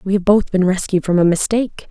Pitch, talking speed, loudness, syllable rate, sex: 195 Hz, 250 wpm, -16 LUFS, 6.1 syllables/s, female